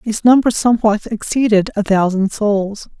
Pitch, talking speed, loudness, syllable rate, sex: 215 Hz, 140 wpm, -15 LUFS, 4.7 syllables/s, female